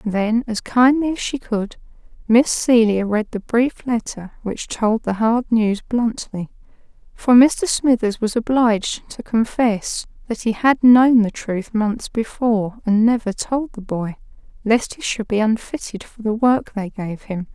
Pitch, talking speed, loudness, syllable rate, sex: 225 Hz, 170 wpm, -19 LUFS, 4.0 syllables/s, female